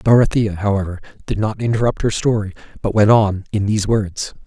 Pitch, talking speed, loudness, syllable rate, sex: 105 Hz, 175 wpm, -18 LUFS, 5.7 syllables/s, male